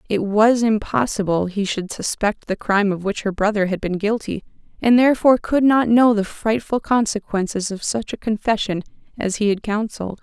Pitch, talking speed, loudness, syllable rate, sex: 210 Hz, 180 wpm, -19 LUFS, 5.3 syllables/s, female